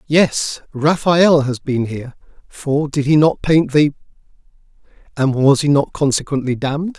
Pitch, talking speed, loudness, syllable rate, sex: 145 Hz, 145 wpm, -16 LUFS, 4.6 syllables/s, male